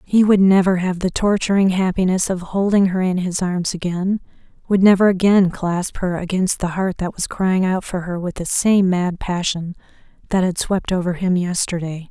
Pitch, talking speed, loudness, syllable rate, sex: 185 Hz, 195 wpm, -18 LUFS, 4.8 syllables/s, female